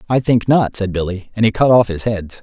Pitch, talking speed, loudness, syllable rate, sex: 105 Hz, 270 wpm, -16 LUFS, 5.4 syllables/s, male